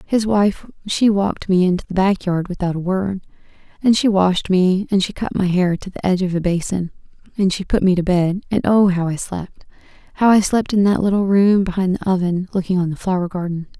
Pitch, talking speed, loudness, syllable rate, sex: 190 Hz, 225 wpm, -18 LUFS, 5.5 syllables/s, female